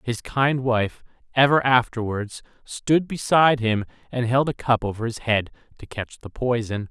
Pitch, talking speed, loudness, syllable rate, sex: 120 Hz, 165 wpm, -22 LUFS, 4.5 syllables/s, male